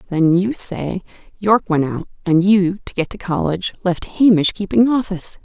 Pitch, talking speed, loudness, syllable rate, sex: 190 Hz, 175 wpm, -17 LUFS, 5.1 syllables/s, female